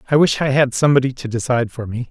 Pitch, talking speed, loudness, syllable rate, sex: 130 Hz, 255 wpm, -17 LUFS, 7.4 syllables/s, male